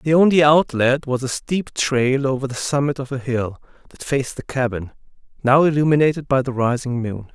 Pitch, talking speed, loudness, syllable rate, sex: 135 Hz, 190 wpm, -19 LUFS, 5.2 syllables/s, male